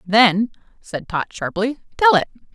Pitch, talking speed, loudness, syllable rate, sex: 220 Hz, 140 wpm, -18 LUFS, 4.0 syllables/s, female